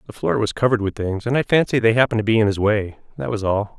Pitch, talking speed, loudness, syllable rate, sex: 105 Hz, 300 wpm, -19 LUFS, 7.0 syllables/s, male